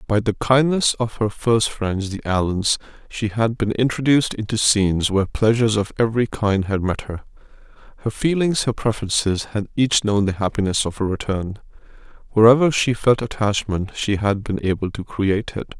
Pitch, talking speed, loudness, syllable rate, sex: 110 Hz, 175 wpm, -20 LUFS, 5.2 syllables/s, male